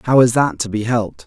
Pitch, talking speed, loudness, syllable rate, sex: 115 Hz, 285 wpm, -17 LUFS, 6.2 syllables/s, male